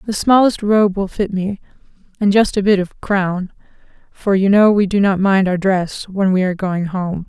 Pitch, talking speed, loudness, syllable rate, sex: 195 Hz, 215 wpm, -16 LUFS, 4.7 syllables/s, female